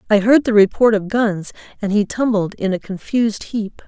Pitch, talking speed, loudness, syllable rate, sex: 210 Hz, 200 wpm, -17 LUFS, 5.0 syllables/s, female